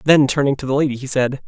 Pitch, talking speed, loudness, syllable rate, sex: 135 Hz, 285 wpm, -18 LUFS, 6.8 syllables/s, male